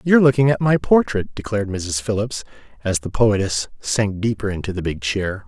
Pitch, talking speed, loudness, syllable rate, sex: 110 Hz, 185 wpm, -20 LUFS, 5.3 syllables/s, male